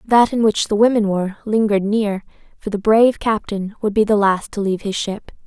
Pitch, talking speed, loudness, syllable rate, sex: 210 Hz, 220 wpm, -18 LUFS, 5.6 syllables/s, female